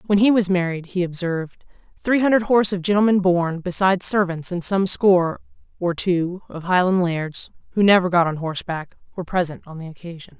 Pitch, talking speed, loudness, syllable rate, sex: 180 Hz, 180 wpm, -20 LUFS, 5.7 syllables/s, female